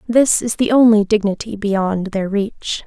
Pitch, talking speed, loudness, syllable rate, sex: 210 Hz, 170 wpm, -16 LUFS, 4.1 syllables/s, female